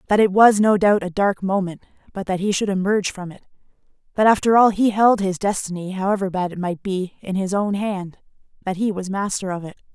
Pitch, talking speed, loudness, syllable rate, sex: 195 Hz, 225 wpm, -20 LUFS, 5.7 syllables/s, female